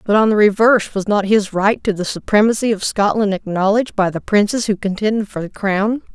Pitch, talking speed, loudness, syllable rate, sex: 205 Hz, 215 wpm, -16 LUFS, 5.7 syllables/s, female